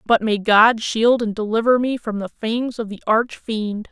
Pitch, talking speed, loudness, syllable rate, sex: 225 Hz, 215 wpm, -19 LUFS, 4.3 syllables/s, female